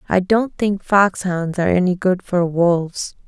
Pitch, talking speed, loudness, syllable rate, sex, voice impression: 185 Hz, 165 wpm, -18 LUFS, 4.3 syllables/s, female, feminine, adult-like, relaxed, dark, slightly muffled, calm, slightly kind, modest